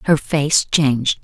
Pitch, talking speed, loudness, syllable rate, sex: 145 Hz, 145 wpm, -16 LUFS, 3.9 syllables/s, female